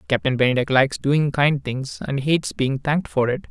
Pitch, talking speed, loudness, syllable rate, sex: 135 Hz, 205 wpm, -21 LUFS, 5.4 syllables/s, male